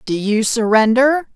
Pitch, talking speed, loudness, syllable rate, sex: 235 Hz, 135 wpm, -15 LUFS, 4.1 syllables/s, female